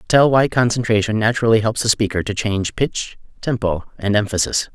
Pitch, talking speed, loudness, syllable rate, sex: 110 Hz, 165 wpm, -18 LUFS, 5.6 syllables/s, male